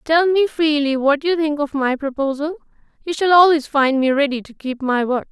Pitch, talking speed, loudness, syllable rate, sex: 290 Hz, 215 wpm, -18 LUFS, 5.1 syllables/s, female